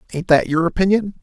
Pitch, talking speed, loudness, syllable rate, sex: 180 Hz, 195 wpm, -17 LUFS, 6.5 syllables/s, male